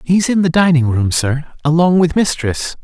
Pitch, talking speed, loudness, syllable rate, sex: 155 Hz, 190 wpm, -14 LUFS, 4.6 syllables/s, male